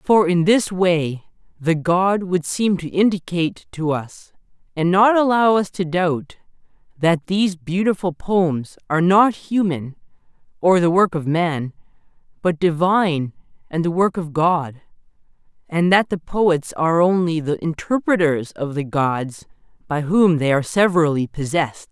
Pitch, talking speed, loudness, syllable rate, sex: 170 Hz, 150 wpm, -19 LUFS, 4.3 syllables/s, male